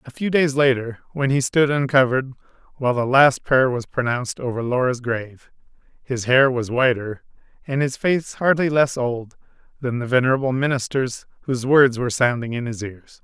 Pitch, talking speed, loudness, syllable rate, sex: 130 Hz, 170 wpm, -20 LUFS, 5.3 syllables/s, male